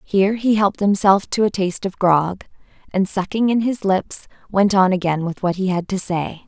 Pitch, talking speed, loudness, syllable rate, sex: 195 Hz, 215 wpm, -19 LUFS, 5.1 syllables/s, female